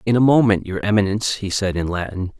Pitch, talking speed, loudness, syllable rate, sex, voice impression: 105 Hz, 225 wpm, -19 LUFS, 6.3 syllables/s, male, masculine, adult-like, slightly middle-aged, thick, tensed, slightly powerful, bright, very hard, clear, slightly fluent, cool, very intellectual, slightly sincere, very calm, mature, slightly friendly, very reassuring, slightly unique, elegant, slightly wild, sweet, slightly lively, slightly strict